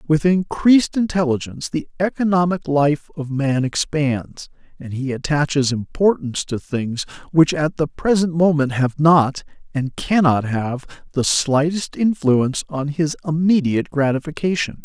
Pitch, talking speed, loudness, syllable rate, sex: 150 Hz, 130 wpm, -19 LUFS, 4.5 syllables/s, male